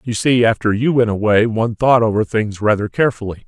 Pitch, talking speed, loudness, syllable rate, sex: 110 Hz, 205 wpm, -16 LUFS, 6.0 syllables/s, male